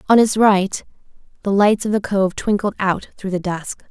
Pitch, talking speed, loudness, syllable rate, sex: 200 Hz, 200 wpm, -18 LUFS, 4.7 syllables/s, female